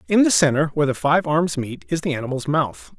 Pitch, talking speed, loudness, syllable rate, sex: 140 Hz, 240 wpm, -20 LUFS, 5.9 syllables/s, male